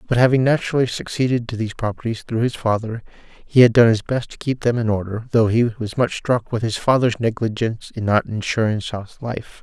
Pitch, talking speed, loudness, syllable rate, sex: 115 Hz, 210 wpm, -20 LUFS, 5.6 syllables/s, male